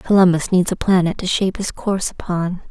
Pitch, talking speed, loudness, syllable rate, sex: 185 Hz, 200 wpm, -18 LUFS, 5.8 syllables/s, female